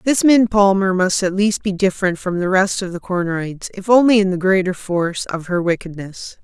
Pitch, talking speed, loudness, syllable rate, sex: 190 Hz, 215 wpm, -17 LUFS, 5.4 syllables/s, female